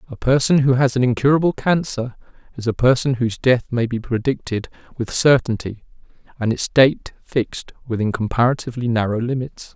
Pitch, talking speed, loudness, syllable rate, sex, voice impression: 125 Hz, 155 wpm, -19 LUFS, 5.5 syllables/s, male, masculine, adult-like, slightly fluent, sincere, slightly calm, slightly unique